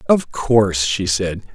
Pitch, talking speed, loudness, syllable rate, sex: 100 Hz, 155 wpm, -18 LUFS, 4.0 syllables/s, male